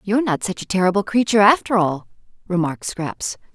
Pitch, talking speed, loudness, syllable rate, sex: 195 Hz, 170 wpm, -19 LUFS, 6.1 syllables/s, female